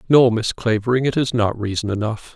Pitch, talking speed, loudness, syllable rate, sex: 115 Hz, 205 wpm, -19 LUFS, 5.5 syllables/s, male